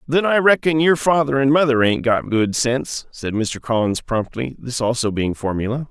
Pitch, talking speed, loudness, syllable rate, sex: 130 Hz, 195 wpm, -19 LUFS, 4.9 syllables/s, male